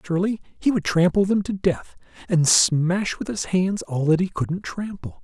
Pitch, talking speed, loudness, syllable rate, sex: 180 Hz, 195 wpm, -22 LUFS, 4.8 syllables/s, male